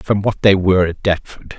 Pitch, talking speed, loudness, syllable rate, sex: 95 Hz, 225 wpm, -16 LUFS, 5.2 syllables/s, male